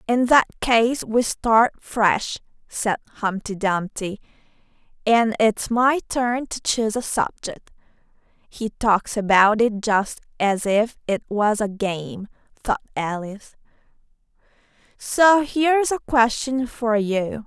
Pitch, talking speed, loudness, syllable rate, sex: 225 Hz, 125 wpm, -21 LUFS, 3.3 syllables/s, female